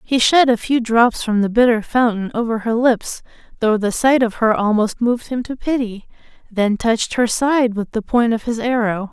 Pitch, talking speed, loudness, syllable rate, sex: 230 Hz, 210 wpm, -17 LUFS, 4.9 syllables/s, female